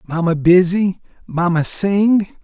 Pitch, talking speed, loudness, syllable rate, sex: 180 Hz, 100 wpm, -15 LUFS, 3.5 syllables/s, male